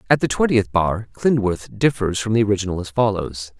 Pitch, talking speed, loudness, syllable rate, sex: 105 Hz, 185 wpm, -20 LUFS, 5.5 syllables/s, male